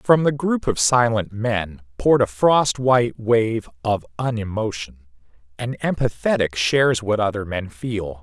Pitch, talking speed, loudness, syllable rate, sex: 110 Hz, 145 wpm, -20 LUFS, 4.4 syllables/s, male